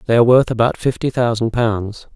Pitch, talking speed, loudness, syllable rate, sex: 115 Hz, 195 wpm, -16 LUFS, 5.6 syllables/s, male